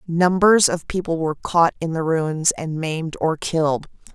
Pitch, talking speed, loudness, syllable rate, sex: 165 Hz, 175 wpm, -20 LUFS, 4.7 syllables/s, female